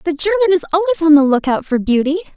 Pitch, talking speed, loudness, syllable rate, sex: 325 Hz, 230 wpm, -14 LUFS, 8.2 syllables/s, female